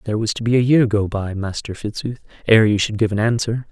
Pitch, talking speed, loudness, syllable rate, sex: 110 Hz, 240 wpm, -18 LUFS, 5.8 syllables/s, male